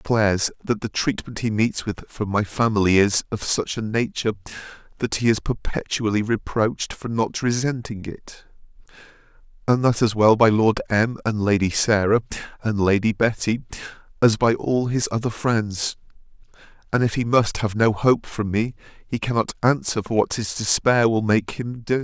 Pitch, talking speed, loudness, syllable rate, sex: 110 Hz, 175 wpm, -21 LUFS, 4.9 syllables/s, male